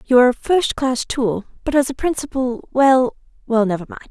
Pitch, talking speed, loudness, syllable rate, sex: 255 Hz, 160 wpm, -18 LUFS, 5.4 syllables/s, female